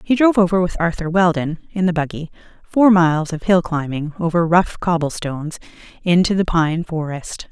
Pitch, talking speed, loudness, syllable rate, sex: 170 Hz, 170 wpm, -18 LUFS, 5.2 syllables/s, female